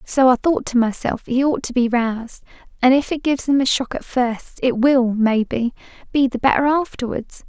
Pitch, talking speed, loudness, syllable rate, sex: 255 Hz, 210 wpm, -19 LUFS, 5.2 syllables/s, female